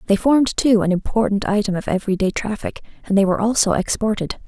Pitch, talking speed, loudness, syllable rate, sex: 205 Hz, 190 wpm, -19 LUFS, 6.5 syllables/s, female